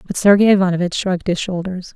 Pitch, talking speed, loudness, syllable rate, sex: 185 Hz, 185 wpm, -16 LUFS, 6.7 syllables/s, female